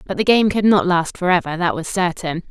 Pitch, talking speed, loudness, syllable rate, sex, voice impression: 180 Hz, 240 wpm, -17 LUFS, 5.5 syllables/s, female, feminine, adult-like, tensed, powerful, hard, clear, fluent, intellectual, elegant, lively, intense, sharp